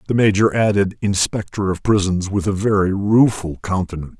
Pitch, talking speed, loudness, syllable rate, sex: 100 Hz, 155 wpm, -18 LUFS, 5.4 syllables/s, male